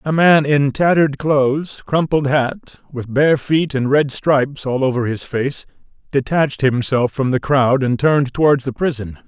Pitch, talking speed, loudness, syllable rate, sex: 140 Hz, 175 wpm, -17 LUFS, 4.6 syllables/s, male